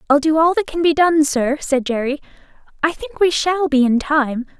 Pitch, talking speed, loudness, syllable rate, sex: 295 Hz, 220 wpm, -17 LUFS, 4.9 syllables/s, female